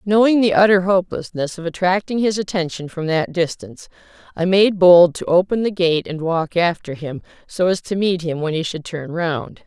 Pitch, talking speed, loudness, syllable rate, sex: 180 Hz, 200 wpm, -18 LUFS, 5.1 syllables/s, female